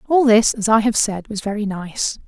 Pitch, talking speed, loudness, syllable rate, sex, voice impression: 220 Hz, 235 wpm, -18 LUFS, 5.0 syllables/s, female, feminine, adult-like, slightly tensed, powerful, bright, soft, raspy, intellectual, friendly, slightly kind